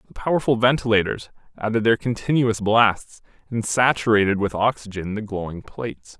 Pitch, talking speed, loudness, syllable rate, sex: 110 Hz, 135 wpm, -21 LUFS, 5.3 syllables/s, male